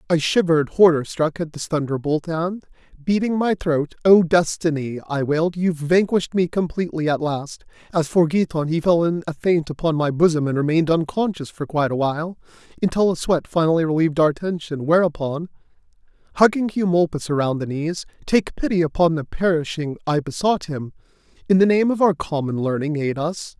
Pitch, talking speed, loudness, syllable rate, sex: 165 Hz, 175 wpm, -20 LUFS, 5.5 syllables/s, male